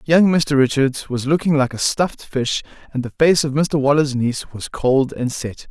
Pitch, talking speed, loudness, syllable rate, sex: 140 Hz, 210 wpm, -18 LUFS, 4.7 syllables/s, male